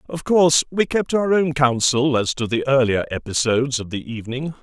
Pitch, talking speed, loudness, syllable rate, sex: 135 Hz, 195 wpm, -19 LUFS, 5.4 syllables/s, male